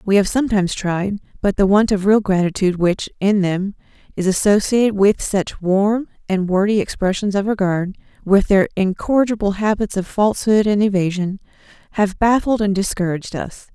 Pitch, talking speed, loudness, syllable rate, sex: 200 Hz, 155 wpm, -18 LUFS, 5.3 syllables/s, female